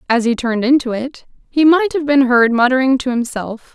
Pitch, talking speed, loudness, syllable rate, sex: 260 Hz, 210 wpm, -15 LUFS, 5.6 syllables/s, female